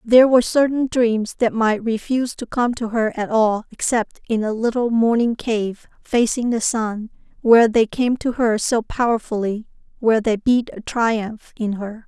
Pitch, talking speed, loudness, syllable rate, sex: 230 Hz, 175 wpm, -19 LUFS, 4.6 syllables/s, female